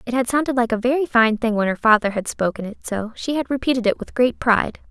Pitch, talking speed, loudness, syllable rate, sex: 240 Hz, 270 wpm, -20 LUFS, 6.2 syllables/s, female